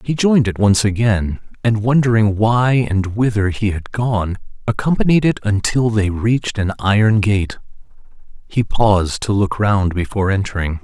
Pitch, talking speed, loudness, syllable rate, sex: 105 Hz, 155 wpm, -17 LUFS, 4.7 syllables/s, male